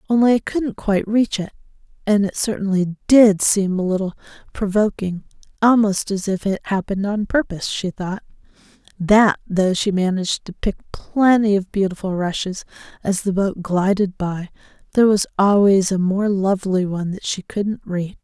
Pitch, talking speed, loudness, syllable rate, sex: 195 Hz, 160 wpm, -19 LUFS, 4.7 syllables/s, female